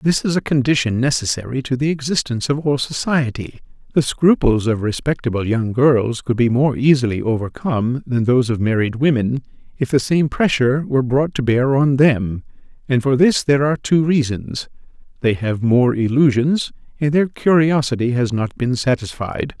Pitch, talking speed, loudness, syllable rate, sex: 130 Hz, 170 wpm, -18 LUFS, 5.1 syllables/s, male